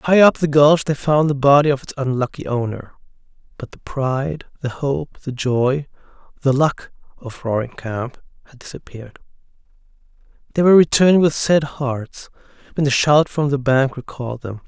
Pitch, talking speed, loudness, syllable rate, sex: 140 Hz, 165 wpm, -18 LUFS, 5.1 syllables/s, male